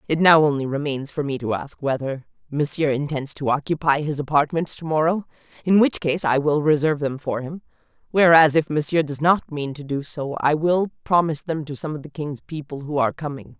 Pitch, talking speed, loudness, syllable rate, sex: 150 Hz, 210 wpm, -21 LUFS, 5.5 syllables/s, female